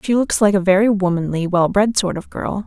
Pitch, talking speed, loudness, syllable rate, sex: 195 Hz, 250 wpm, -17 LUFS, 5.5 syllables/s, female